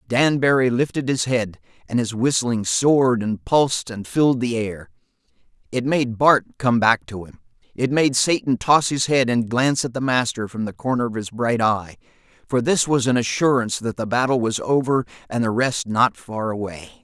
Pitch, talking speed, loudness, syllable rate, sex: 120 Hz, 195 wpm, -20 LUFS, 5.0 syllables/s, male